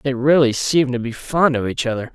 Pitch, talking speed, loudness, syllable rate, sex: 130 Hz, 250 wpm, -18 LUFS, 5.2 syllables/s, male